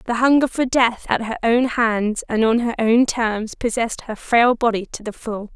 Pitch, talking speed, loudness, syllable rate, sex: 230 Hz, 215 wpm, -19 LUFS, 4.6 syllables/s, female